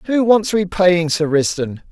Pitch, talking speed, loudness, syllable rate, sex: 185 Hz, 155 wpm, -16 LUFS, 4.1 syllables/s, male